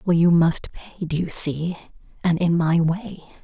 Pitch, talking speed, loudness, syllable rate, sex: 170 Hz, 190 wpm, -21 LUFS, 4.3 syllables/s, female